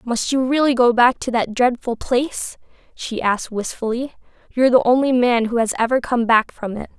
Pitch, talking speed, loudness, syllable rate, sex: 240 Hz, 205 wpm, -18 LUFS, 5.5 syllables/s, female